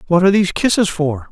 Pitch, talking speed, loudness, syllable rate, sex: 175 Hz, 230 wpm, -15 LUFS, 7.2 syllables/s, male